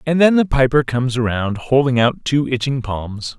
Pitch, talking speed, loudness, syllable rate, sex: 130 Hz, 195 wpm, -17 LUFS, 4.9 syllables/s, male